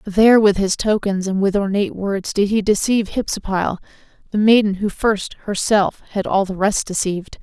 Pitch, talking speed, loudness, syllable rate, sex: 200 Hz, 180 wpm, -18 LUFS, 5.4 syllables/s, female